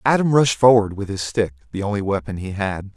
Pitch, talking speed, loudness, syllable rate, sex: 105 Hz, 225 wpm, -20 LUFS, 5.7 syllables/s, male